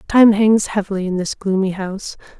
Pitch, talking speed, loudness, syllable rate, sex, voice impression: 200 Hz, 175 wpm, -17 LUFS, 5.4 syllables/s, female, feminine, adult-like, weak, soft, fluent, intellectual, calm, reassuring, elegant, kind, modest